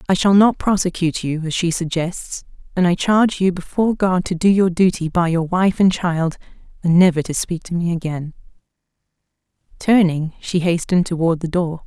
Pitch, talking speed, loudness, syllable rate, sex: 175 Hz, 180 wpm, -18 LUFS, 5.3 syllables/s, female